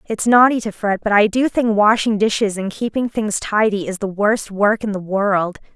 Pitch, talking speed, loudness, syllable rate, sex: 210 Hz, 220 wpm, -17 LUFS, 4.8 syllables/s, female